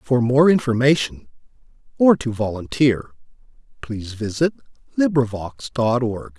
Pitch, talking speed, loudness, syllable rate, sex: 120 Hz, 105 wpm, -20 LUFS, 4.4 syllables/s, male